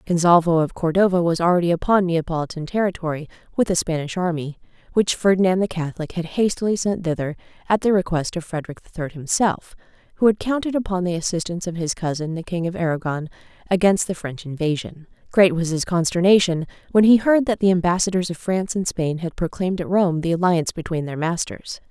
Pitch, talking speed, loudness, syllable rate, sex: 175 Hz, 185 wpm, -21 LUFS, 6.1 syllables/s, female